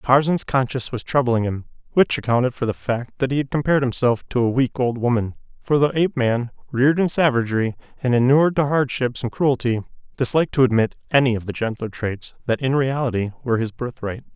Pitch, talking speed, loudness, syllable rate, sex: 125 Hz, 190 wpm, -21 LUFS, 6.0 syllables/s, male